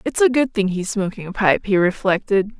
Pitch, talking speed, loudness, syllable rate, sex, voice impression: 200 Hz, 230 wpm, -19 LUFS, 5.3 syllables/s, female, feminine, adult-like, tensed, hard, clear, halting, calm, friendly, reassuring, lively, kind